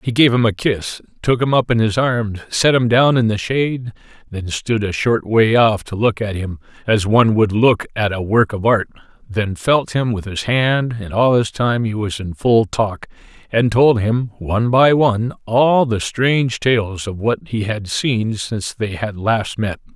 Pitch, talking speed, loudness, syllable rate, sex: 110 Hz, 215 wpm, -17 LUFS, 4.4 syllables/s, male